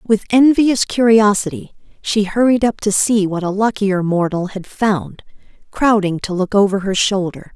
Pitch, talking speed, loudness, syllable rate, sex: 205 Hz, 160 wpm, -16 LUFS, 4.5 syllables/s, female